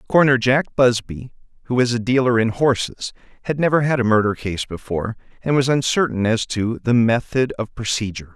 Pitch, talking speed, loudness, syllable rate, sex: 120 Hz, 180 wpm, -19 LUFS, 5.7 syllables/s, male